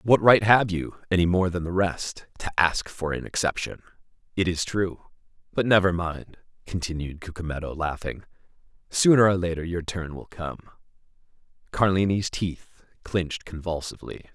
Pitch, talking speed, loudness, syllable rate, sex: 90 Hz, 135 wpm, -25 LUFS, 4.9 syllables/s, male